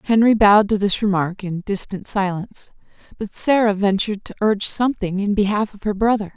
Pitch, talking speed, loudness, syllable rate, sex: 205 Hz, 180 wpm, -19 LUFS, 5.8 syllables/s, female